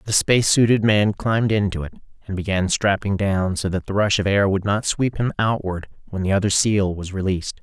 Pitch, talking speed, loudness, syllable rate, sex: 100 Hz, 210 wpm, -20 LUFS, 5.5 syllables/s, male